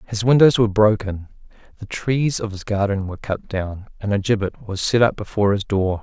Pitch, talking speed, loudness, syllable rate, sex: 105 Hz, 210 wpm, -20 LUFS, 5.5 syllables/s, male